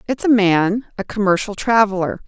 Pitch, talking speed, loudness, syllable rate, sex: 210 Hz, 130 wpm, -17 LUFS, 5.1 syllables/s, female